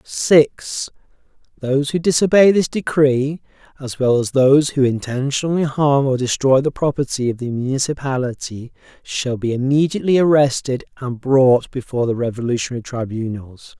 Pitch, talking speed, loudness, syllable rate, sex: 135 Hz, 130 wpm, -18 LUFS, 5.2 syllables/s, male